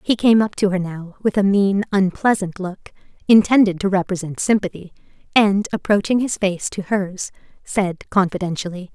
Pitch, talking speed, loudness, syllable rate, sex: 195 Hz, 155 wpm, -19 LUFS, 4.9 syllables/s, female